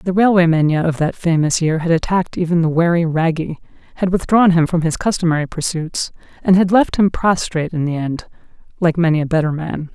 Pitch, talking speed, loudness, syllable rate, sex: 170 Hz, 200 wpm, -17 LUFS, 5.8 syllables/s, female